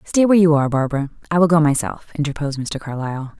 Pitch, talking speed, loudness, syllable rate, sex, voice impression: 150 Hz, 210 wpm, -18 LUFS, 7.4 syllables/s, female, very feminine, very adult-like, slightly thin, slightly tensed, powerful, bright, soft, clear, slightly fluent, raspy, slightly cute, cool, intellectual, refreshing, sincere, slightly calm, friendly, reassuring, slightly unique, slightly elegant, slightly wild, sweet, lively, kind, slightly modest, light